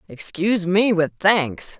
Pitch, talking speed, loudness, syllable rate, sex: 175 Hz, 135 wpm, -19 LUFS, 3.9 syllables/s, female